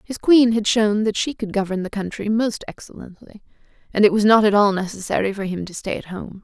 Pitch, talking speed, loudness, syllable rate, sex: 205 Hz, 235 wpm, -19 LUFS, 5.7 syllables/s, female